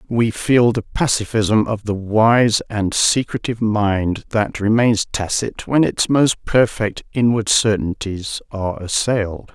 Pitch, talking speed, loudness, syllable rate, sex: 110 Hz, 130 wpm, -18 LUFS, 3.8 syllables/s, male